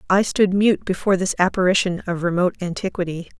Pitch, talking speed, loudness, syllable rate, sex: 185 Hz, 160 wpm, -20 LUFS, 6.2 syllables/s, female